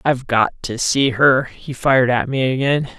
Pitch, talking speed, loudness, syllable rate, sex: 130 Hz, 200 wpm, -17 LUFS, 4.8 syllables/s, male